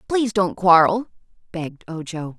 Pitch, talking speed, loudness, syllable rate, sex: 180 Hz, 125 wpm, -20 LUFS, 5.2 syllables/s, female